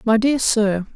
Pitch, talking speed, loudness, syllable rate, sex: 225 Hz, 190 wpm, -18 LUFS, 3.8 syllables/s, female